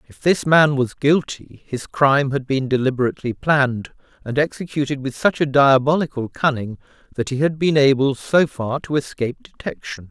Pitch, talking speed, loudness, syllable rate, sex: 135 Hz, 165 wpm, -19 LUFS, 5.2 syllables/s, male